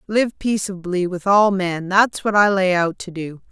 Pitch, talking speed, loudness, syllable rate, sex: 190 Hz, 190 wpm, -18 LUFS, 4.3 syllables/s, female